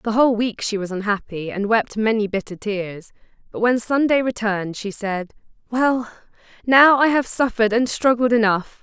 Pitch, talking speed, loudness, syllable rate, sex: 220 Hz, 170 wpm, -19 LUFS, 5.0 syllables/s, female